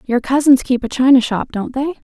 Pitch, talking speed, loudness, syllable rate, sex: 260 Hz, 225 wpm, -15 LUFS, 5.2 syllables/s, female